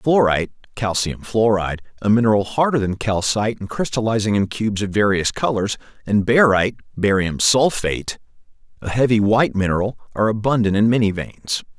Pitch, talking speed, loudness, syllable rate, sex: 110 Hz, 145 wpm, -19 LUFS, 5.4 syllables/s, male